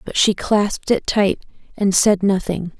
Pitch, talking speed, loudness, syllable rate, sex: 195 Hz, 170 wpm, -18 LUFS, 4.3 syllables/s, female